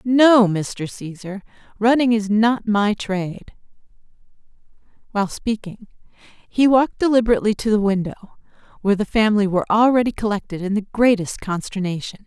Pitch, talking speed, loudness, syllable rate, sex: 210 Hz, 125 wpm, -19 LUFS, 5.6 syllables/s, female